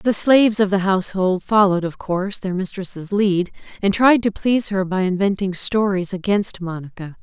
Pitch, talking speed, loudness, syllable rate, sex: 195 Hz, 175 wpm, -19 LUFS, 5.1 syllables/s, female